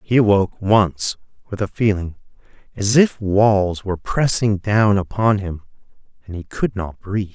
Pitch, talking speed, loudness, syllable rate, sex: 100 Hz, 155 wpm, -18 LUFS, 4.6 syllables/s, male